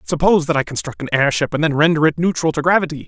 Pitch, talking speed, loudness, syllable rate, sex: 155 Hz, 255 wpm, -17 LUFS, 7.2 syllables/s, male